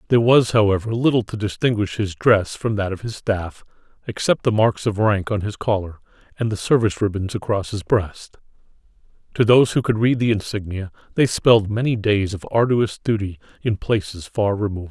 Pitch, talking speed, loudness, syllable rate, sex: 105 Hz, 185 wpm, -20 LUFS, 5.5 syllables/s, male